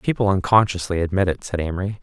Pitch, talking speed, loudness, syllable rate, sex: 95 Hz, 180 wpm, -20 LUFS, 6.5 syllables/s, male